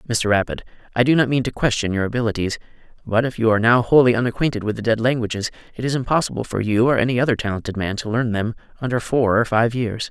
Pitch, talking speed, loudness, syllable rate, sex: 115 Hz, 230 wpm, -20 LUFS, 6.8 syllables/s, male